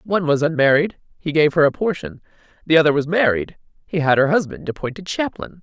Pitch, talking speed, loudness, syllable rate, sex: 165 Hz, 170 wpm, -19 LUFS, 6.1 syllables/s, female